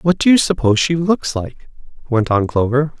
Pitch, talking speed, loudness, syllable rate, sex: 140 Hz, 200 wpm, -16 LUFS, 5.1 syllables/s, male